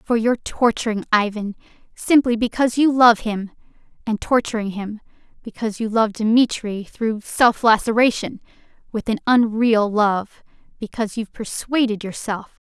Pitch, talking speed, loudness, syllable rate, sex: 225 Hz, 115 wpm, -19 LUFS, 4.8 syllables/s, female